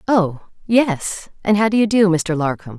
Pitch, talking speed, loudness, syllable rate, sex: 190 Hz, 195 wpm, -18 LUFS, 4.5 syllables/s, female